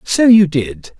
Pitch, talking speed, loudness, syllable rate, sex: 170 Hz, 180 wpm, -12 LUFS, 3.4 syllables/s, male